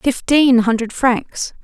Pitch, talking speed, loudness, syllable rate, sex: 245 Hz, 110 wpm, -15 LUFS, 3.3 syllables/s, female